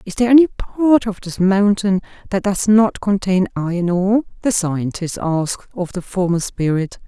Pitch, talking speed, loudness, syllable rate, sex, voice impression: 195 Hz, 170 wpm, -17 LUFS, 4.8 syllables/s, female, feminine, very adult-like, slightly muffled, calm, slightly elegant